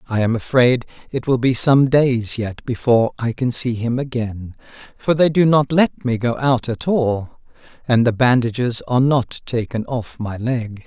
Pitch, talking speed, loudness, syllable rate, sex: 120 Hz, 190 wpm, -18 LUFS, 4.5 syllables/s, male